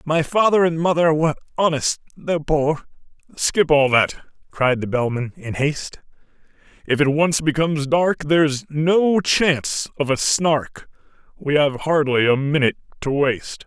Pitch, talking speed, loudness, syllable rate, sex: 150 Hz, 150 wpm, -19 LUFS, 4.6 syllables/s, male